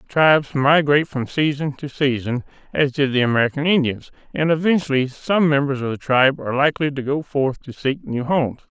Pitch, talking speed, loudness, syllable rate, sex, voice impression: 140 Hz, 185 wpm, -19 LUFS, 5.6 syllables/s, male, very masculine, very adult-like, old, thick, slightly relaxed, slightly powerful, bright, slightly hard, clear, fluent, slightly raspy, cool, very intellectual, slightly refreshing, sincere, slightly calm, mature, friendly, reassuring, very unique, slightly elegant, very wild, slightly lively, kind, slightly intense, slightly sharp, slightly modest